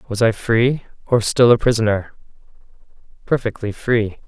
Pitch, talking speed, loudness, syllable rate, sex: 115 Hz, 125 wpm, -18 LUFS, 4.8 syllables/s, male